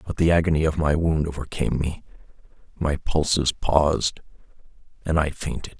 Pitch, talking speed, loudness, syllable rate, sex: 75 Hz, 145 wpm, -23 LUFS, 5.4 syllables/s, male